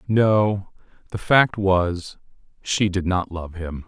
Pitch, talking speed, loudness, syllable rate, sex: 95 Hz, 140 wpm, -21 LUFS, 3.1 syllables/s, male